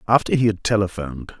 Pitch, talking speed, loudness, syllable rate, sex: 105 Hz, 170 wpm, -21 LUFS, 6.7 syllables/s, male